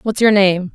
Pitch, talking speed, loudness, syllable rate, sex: 200 Hz, 240 wpm, -14 LUFS, 4.6 syllables/s, female